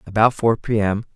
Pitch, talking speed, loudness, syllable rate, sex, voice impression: 110 Hz, 155 wpm, -19 LUFS, 5.3 syllables/s, male, masculine, adult-like, weak, soft, halting, cool, slightly refreshing, friendly, reassuring, kind, modest